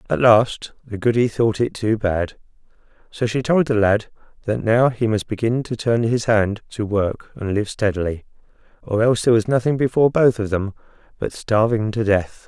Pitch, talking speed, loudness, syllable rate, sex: 110 Hz, 190 wpm, -19 LUFS, 5.0 syllables/s, male